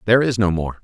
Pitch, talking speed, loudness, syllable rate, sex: 100 Hz, 285 wpm, -18 LUFS, 7.5 syllables/s, male